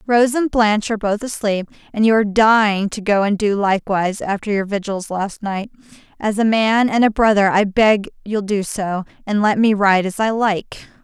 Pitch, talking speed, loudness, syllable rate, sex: 210 Hz, 205 wpm, -17 LUFS, 5.1 syllables/s, female